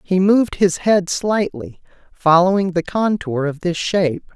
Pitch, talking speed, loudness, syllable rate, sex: 180 Hz, 150 wpm, -17 LUFS, 4.3 syllables/s, female